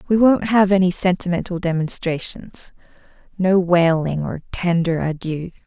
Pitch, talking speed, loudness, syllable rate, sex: 175 Hz, 115 wpm, -19 LUFS, 4.5 syllables/s, female